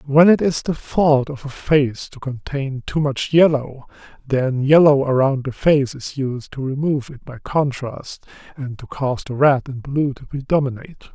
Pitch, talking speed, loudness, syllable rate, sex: 135 Hz, 185 wpm, -19 LUFS, 4.5 syllables/s, male